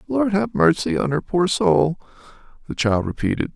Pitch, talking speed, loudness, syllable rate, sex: 140 Hz, 170 wpm, -20 LUFS, 4.8 syllables/s, male